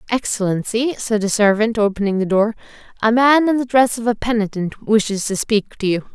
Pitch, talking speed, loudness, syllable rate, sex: 220 Hz, 195 wpm, -18 LUFS, 5.4 syllables/s, female